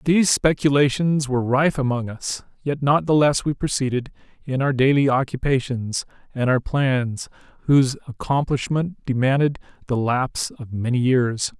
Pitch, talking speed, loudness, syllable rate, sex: 135 Hz, 140 wpm, -21 LUFS, 4.8 syllables/s, male